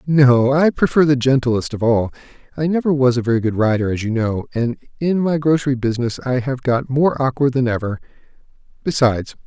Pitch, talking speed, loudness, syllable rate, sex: 130 Hz, 190 wpm, -18 LUFS, 5.6 syllables/s, male